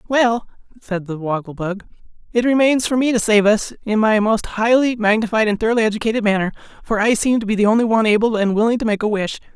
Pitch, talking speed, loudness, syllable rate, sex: 220 Hz, 225 wpm, -17 LUFS, 6.4 syllables/s, male